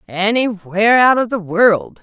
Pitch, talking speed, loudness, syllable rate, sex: 205 Hz, 150 wpm, -14 LUFS, 4.3 syllables/s, female